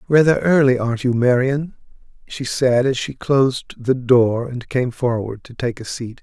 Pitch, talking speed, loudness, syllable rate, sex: 125 Hz, 185 wpm, -18 LUFS, 4.5 syllables/s, male